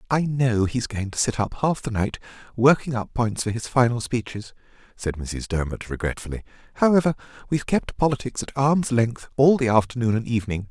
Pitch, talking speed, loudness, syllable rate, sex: 120 Hz, 185 wpm, -23 LUFS, 5.5 syllables/s, male